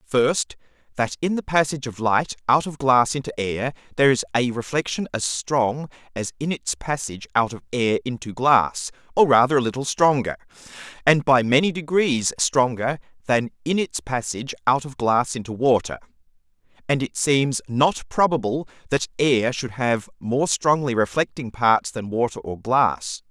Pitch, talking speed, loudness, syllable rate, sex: 130 Hz, 160 wpm, -22 LUFS, 4.7 syllables/s, male